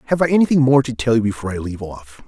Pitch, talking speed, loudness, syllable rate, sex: 120 Hz, 290 wpm, -17 LUFS, 7.8 syllables/s, male